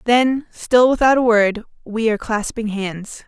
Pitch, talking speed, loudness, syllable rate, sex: 225 Hz, 165 wpm, -17 LUFS, 4.2 syllables/s, female